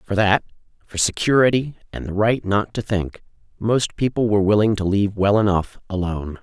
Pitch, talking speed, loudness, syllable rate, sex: 105 Hz, 180 wpm, -20 LUFS, 5.5 syllables/s, male